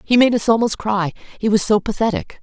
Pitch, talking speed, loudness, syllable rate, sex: 215 Hz, 220 wpm, -18 LUFS, 5.5 syllables/s, female